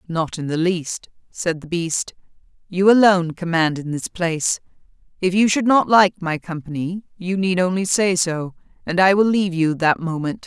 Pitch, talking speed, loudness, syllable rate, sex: 175 Hz, 185 wpm, -19 LUFS, 4.8 syllables/s, female